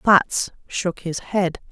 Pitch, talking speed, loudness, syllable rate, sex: 180 Hz, 140 wpm, -22 LUFS, 2.9 syllables/s, female